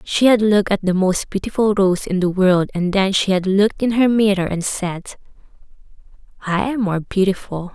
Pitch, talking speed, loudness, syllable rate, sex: 195 Hz, 195 wpm, -18 LUFS, 5.1 syllables/s, female